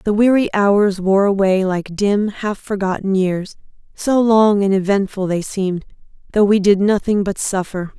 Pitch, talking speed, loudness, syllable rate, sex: 200 Hz, 165 wpm, -17 LUFS, 4.5 syllables/s, female